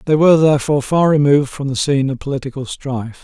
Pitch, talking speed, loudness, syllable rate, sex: 140 Hz, 205 wpm, -16 LUFS, 7.1 syllables/s, male